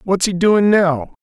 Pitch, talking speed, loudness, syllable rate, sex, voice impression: 185 Hz, 195 wpm, -15 LUFS, 3.7 syllables/s, male, very masculine, very adult-like, slightly thick, cool, slightly intellectual, slightly calm, slightly kind